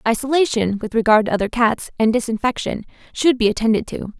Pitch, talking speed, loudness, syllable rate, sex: 230 Hz, 170 wpm, -18 LUFS, 5.9 syllables/s, female